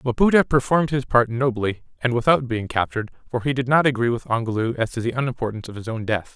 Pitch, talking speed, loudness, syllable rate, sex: 125 Hz, 215 wpm, -22 LUFS, 6.7 syllables/s, male